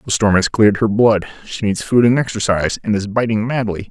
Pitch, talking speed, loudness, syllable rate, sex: 105 Hz, 230 wpm, -16 LUFS, 5.9 syllables/s, male